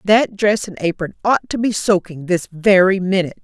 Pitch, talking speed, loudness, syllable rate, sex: 190 Hz, 190 wpm, -17 LUFS, 5.2 syllables/s, female